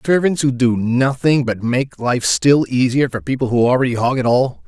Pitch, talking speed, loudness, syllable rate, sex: 125 Hz, 205 wpm, -16 LUFS, 4.8 syllables/s, male